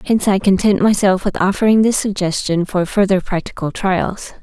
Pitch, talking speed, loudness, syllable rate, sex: 195 Hz, 165 wpm, -16 LUFS, 5.2 syllables/s, female